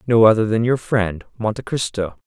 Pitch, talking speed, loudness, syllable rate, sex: 110 Hz, 185 wpm, -19 LUFS, 5.2 syllables/s, male